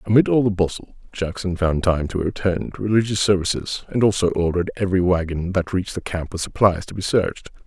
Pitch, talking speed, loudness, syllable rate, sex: 95 Hz, 195 wpm, -21 LUFS, 5.9 syllables/s, male